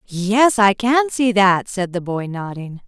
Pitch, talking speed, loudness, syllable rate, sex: 205 Hz, 190 wpm, -17 LUFS, 3.7 syllables/s, female